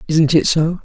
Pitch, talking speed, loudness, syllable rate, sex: 150 Hz, 215 wpm, -14 LUFS, 4.7 syllables/s, male